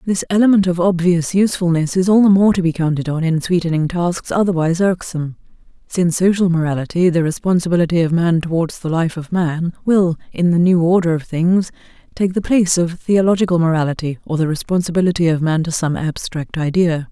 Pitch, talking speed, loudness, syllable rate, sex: 170 Hz, 180 wpm, -16 LUFS, 5.9 syllables/s, female